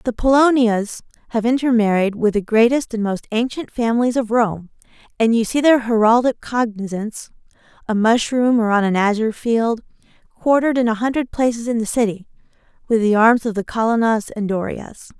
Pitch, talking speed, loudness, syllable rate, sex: 230 Hz, 165 wpm, -18 LUFS, 4.9 syllables/s, female